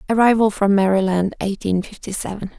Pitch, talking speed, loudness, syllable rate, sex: 200 Hz, 140 wpm, -19 LUFS, 5.6 syllables/s, female